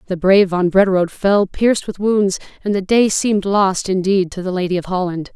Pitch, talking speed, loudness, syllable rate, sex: 190 Hz, 215 wpm, -16 LUFS, 5.7 syllables/s, female